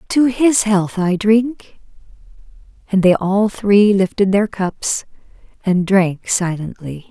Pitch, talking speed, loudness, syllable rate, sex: 200 Hz, 125 wpm, -16 LUFS, 3.5 syllables/s, female